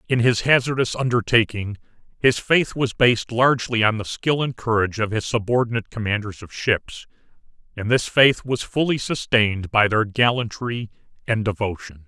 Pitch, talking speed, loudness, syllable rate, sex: 115 Hz, 155 wpm, -20 LUFS, 5.2 syllables/s, male